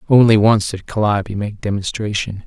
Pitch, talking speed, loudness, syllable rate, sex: 105 Hz, 145 wpm, -17 LUFS, 5.3 syllables/s, male